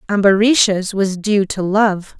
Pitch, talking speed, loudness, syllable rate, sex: 200 Hz, 135 wpm, -15 LUFS, 4.0 syllables/s, female